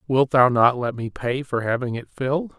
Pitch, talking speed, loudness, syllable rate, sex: 130 Hz, 230 wpm, -21 LUFS, 5.0 syllables/s, male